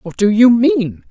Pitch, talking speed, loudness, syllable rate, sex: 235 Hz, 215 wpm, -12 LUFS, 3.9 syllables/s, female